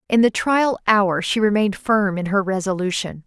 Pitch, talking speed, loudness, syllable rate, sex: 205 Hz, 185 wpm, -19 LUFS, 5.0 syllables/s, female